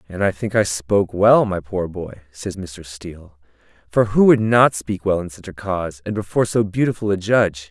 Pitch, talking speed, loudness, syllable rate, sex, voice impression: 95 Hz, 220 wpm, -19 LUFS, 5.2 syllables/s, male, very masculine, very adult-like, slightly old, very thick, tensed, powerful, slightly bright, slightly hard, clear, fluent, cool, very intellectual, sincere, very calm, very mature, friendly, reassuring, unique, elegant, slightly wild, sweet, lively, kind, slightly intense